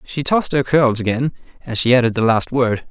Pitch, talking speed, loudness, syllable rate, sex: 125 Hz, 230 wpm, -17 LUFS, 5.7 syllables/s, male